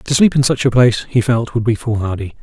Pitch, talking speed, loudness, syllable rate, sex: 120 Hz, 270 wpm, -15 LUFS, 6.0 syllables/s, male